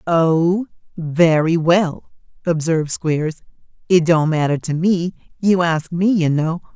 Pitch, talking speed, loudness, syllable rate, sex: 165 Hz, 135 wpm, -18 LUFS, 4.0 syllables/s, female